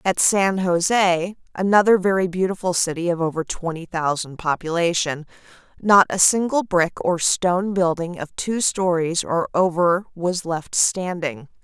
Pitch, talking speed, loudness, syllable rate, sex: 175 Hz, 140 wpm, -20 LUFS, 4.3 syllables/s, female